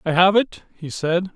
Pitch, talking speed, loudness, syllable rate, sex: 180 Hz, 220 wpm, -19 LUFS, 4.6 syllables/s, male